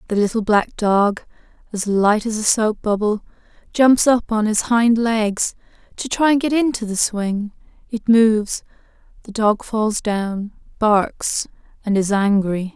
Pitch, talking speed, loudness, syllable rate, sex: 215 Hz, 155 wpm, -18 LUFS, 4.0 syllables/s, female